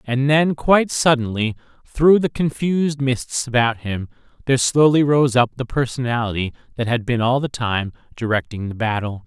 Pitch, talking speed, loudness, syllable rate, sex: 125 Hz, 160 wpm, -19 LUFS, 5.1 syllables/s, male